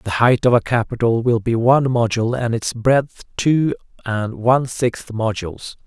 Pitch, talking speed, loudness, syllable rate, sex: 120 Hz, 175 wpm, -18 LUFS, 4.7 syllables/s, male